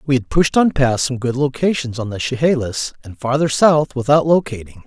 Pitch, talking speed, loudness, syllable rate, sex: 135 Hz, 195 wpm, -17 LUFS, 5.2 syllables/s, male